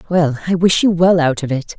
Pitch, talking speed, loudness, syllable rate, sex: 165 Hz, 270 wpm, -15 LUFS, 5.4 syllables/s, female